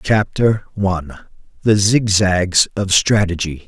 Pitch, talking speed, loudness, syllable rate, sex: 100 Hz, 80 wpm, -16 LUFS, 3.6 syllables/s, male